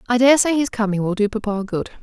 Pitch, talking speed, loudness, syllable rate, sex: 225 Hz, 265 wpm, -19 LUFS, 6.4 syllables/s, female